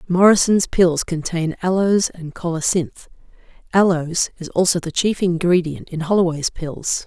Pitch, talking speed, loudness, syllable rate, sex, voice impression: 175 Hz, 125 wpm, -19 LUFS, 4.3 syllables/s, female, very feminine, slightly old, slightly thin, slightly tensed, slightly weak, slightly dark, slightly soft, clear, slightly fluent, raspy, slightly cool, intellectual, slightly refreshing, sincere, very calm, slightly friendly, slightly reassuring, unique, elegant, sweet, lively, slightly kind, slightly strict, slightly intense, slightly modest